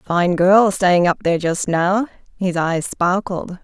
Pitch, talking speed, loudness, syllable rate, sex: 185 Hz, 165 wpm, -17 LUFS, 3.8 syllables/s, female